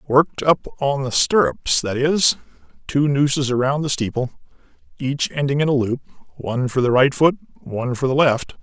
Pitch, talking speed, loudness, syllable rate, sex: 135 Hz, 175 wpm, -19 LUFS, 5.1 syllables/s, male